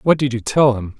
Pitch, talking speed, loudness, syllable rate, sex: 125 Hz, 300 wpm, -17 LUFS, 5.3 syllables/s, male